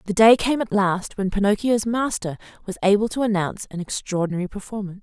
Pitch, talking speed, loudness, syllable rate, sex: 205 Hz, 180 wpm, -22 LUFS, 6.2 syllables/s, female